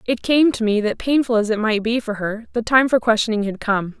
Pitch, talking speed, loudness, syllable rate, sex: 225 Hz, 270 wpm, -19 LUFS, 5.5 syllables/s, female